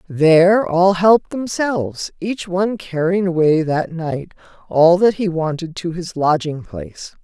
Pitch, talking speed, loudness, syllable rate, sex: 175 Hz, 150 wpm, -17 LUFS, 4.3 syllables/s, female